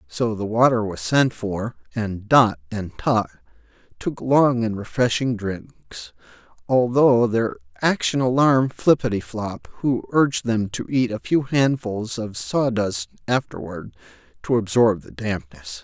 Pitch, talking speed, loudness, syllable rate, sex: 110 Hz, 135 wpm, -21 LUFS, 4.0 syllables/s, male